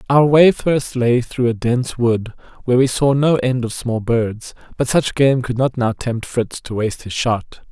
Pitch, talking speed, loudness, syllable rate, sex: 125 Hz, 220 wpm, -17 LUFS, 4.5 syllables/s, male